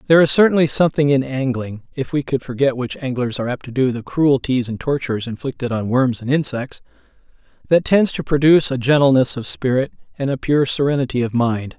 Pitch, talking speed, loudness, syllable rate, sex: 135 Hz, 190 wpm, -18 LUFS, 6.0 syllables/s, male